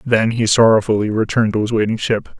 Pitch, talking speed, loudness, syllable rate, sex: 110 Hz, 200 wpm, -16 LUFS, 6.2 syllables/s, male